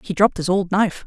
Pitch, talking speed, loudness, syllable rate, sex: 190 Hz, 280 wpm, -19 LUFS, 7.2 syllables/s, female